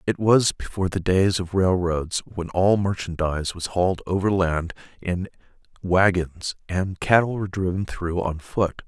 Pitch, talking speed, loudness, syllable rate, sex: 90 Hz, 150 wpm, -23 LUFS, 4.5 syllables/s, male